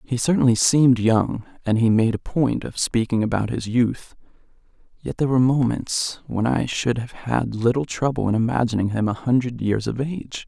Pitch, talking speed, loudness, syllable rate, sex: 120 Hz, 180 wpm, -21 LUFS, 5.2 syllables/s, male